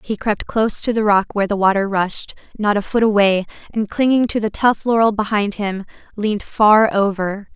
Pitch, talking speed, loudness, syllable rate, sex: 210 Hz, 200 wpm, -17 LUFS, 5.2 syllables/s, female